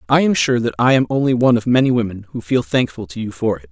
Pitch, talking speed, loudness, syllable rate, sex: 125 Hz, 290 wpm, -17 LUFS, 6.7 syllables/s, male